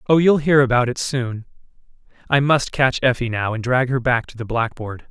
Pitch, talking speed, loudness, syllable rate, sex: 125 Hz, 200 wpm, -19 LUFS, 5.2 syllables/s, male